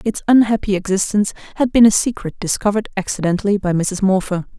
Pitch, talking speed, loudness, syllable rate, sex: 200 Hz, 155 wpm, -17 LUFS, 6.4 syllables/s, female